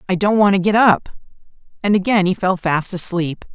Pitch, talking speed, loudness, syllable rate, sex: 190 Hz, 205 wpm, -16 LUFS, 5.4 syllables/s, female